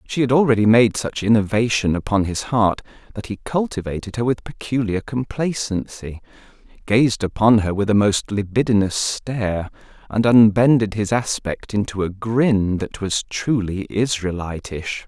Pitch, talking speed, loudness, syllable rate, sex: 110 Hz, 140 wpm, -19 LUFS, 4.6 syllables/s, male